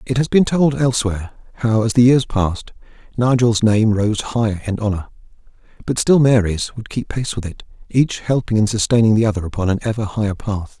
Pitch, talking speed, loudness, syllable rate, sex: 110 Hz, 195 wpm, -17 LUFS, 5.6 syllables/s, male